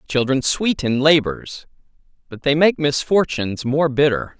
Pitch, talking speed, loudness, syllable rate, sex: 140 Hz, 125 wpm, -18 LUFS, 4.4 syllables/s, male